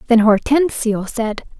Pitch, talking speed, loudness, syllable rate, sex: 235 Hz, 115 wpm, -17 LUFS, 4.1 syllables/s, female